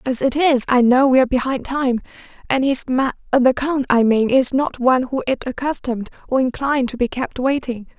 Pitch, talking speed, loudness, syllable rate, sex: 255 Hz, 205 wpm, -18 LUFS, 5.5 syllables/s, female